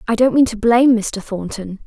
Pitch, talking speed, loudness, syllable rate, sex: 220 Hz, 225 wpm, -16 LUFS, 5.4 syllables/s, female